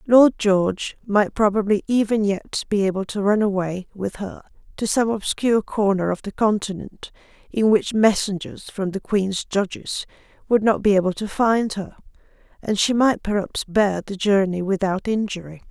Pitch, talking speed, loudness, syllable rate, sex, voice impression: 205 Hz, 165 wpm, -21 LUFS, 4.7 syllables/s, female, feminine, adult-like, relaxed, weak, slightly dark, muffled, slightly raspy, slightly sincere, calm, friendly, kind, modest